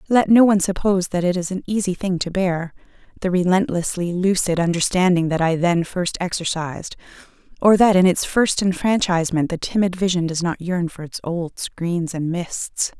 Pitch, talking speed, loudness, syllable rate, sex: 180 Hz, 180 wpm, -20 LUFS, 5.1 syllables/s, female